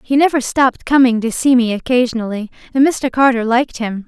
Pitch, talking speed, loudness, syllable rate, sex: 245 Hz, 190 wpm, -15 LUFS, 5.9 syllables/s, female